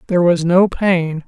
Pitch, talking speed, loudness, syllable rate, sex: 175 Hz, 190 wpm, -15 LUFS, 4.7 syllables/s, male